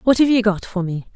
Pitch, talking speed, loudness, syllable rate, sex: 210 Hz, 310 wpm, -18 LUFS, 6.0 syllables/s, female